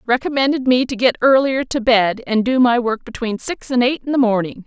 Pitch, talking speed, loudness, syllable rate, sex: 245 Hz, 230 wpm, -17 LUFS, 5.3 syllables/s, female